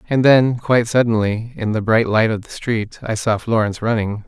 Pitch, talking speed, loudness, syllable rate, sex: 110 Hz, 210 wpm, -18 LUFS, 5.2 syllables/s, male